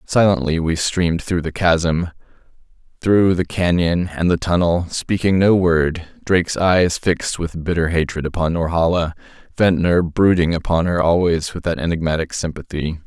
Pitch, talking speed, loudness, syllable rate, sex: 85 Hz, 140 wpm, -18 LUFS, 4.7 syllables/s, male